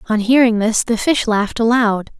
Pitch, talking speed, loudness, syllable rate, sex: 230 Hz, 190 wpm, -15 LUFS, 5.1 syllables/s, female